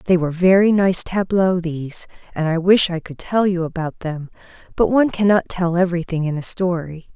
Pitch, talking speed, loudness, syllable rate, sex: 175 Hz, 195 wpm, -18 LUFS, 5.4 syllables/s, female